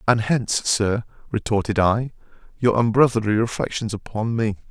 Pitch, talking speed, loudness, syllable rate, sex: 110 Hz, 130 wpm, -21 LUFS, 5.1 syllables/s, male